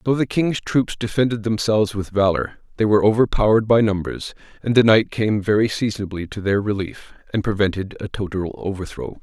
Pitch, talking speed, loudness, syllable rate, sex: 105 Hz, 175 wpm, -20 LUFS, 5.7 syllables/s, male